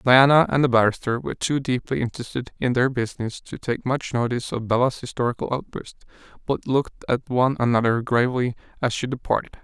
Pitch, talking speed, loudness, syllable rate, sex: 125 Hz, 175 wpm, -23 LUFS, 6.1 syllables/s, male